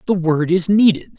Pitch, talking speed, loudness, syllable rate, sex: 180 Hz, 205 wpm, -15 LUFS, 4.9 syllables/s, male